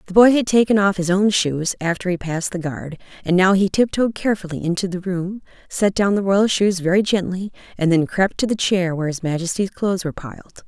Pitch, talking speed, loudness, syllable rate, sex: 185 Hz, 225 wpm, -19 LUFS, 5.9 syllables/s, female